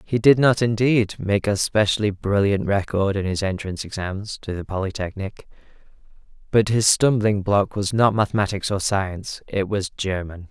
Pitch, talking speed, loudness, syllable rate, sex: 100 Hz, 155 wpm, -21 LUFS, 5.3 syllables/s, male